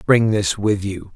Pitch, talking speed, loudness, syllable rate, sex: 100 Hz, 210 wpm, -19 LUFS, 4.0 syllables/s, male